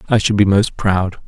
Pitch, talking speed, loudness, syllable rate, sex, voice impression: 100 Hz, 235 wpm, -15 LUFS, 5.0 syllables/s, male, masculine, middle-aged, tensed, powerful, soft, clear, cool, intellectual, mature, friendly, reassuring, slightly wild, kind, modest